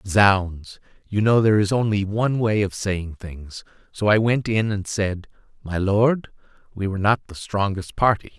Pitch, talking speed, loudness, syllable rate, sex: 105 Hz, 170 wpm, -21 LUFS, 4.4 syllables/s, male